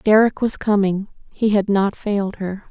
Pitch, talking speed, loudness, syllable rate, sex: 205 Hz, 175 wpm, -19 LUFS, 4.5 syllables/s, female